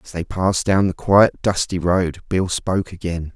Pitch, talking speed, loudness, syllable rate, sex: 90 Hz, 195 wpm, -19 LUFS, 5.3 syllables/s, male